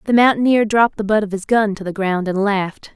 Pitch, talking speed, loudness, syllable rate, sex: 205 Hz, 265 wpm, -17 LUFS, 6.1 syllables/s, female